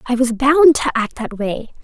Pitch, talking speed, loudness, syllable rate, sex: 250 Hz, 230 wpm, -16 LUFS, 4.8 syllables/s, female